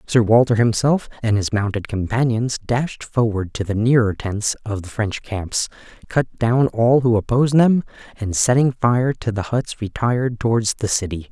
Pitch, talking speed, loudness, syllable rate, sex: 115 Hz, 175 wpm, -19 LUFS, 4.6 syllables/s, male